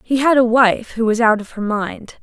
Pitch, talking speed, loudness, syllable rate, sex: 230 Hz, 270 wpm, -16 LUFS, 4.7 syllables/s, female